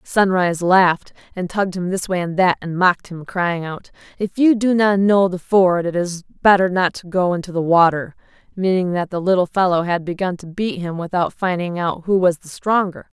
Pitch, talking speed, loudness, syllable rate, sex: 180 Hz, 215 wpm, -18 LUFS, 5.1 syllables/s, female